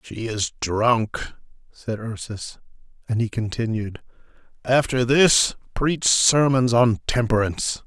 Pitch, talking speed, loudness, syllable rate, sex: 115 Hz, 105 wpm, -21 LUFS, 3.7 syllables/s, male